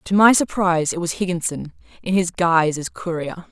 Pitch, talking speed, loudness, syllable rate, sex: 175 Hz, 170 wpm, -19 LUFS, 5.6 syllables/s, female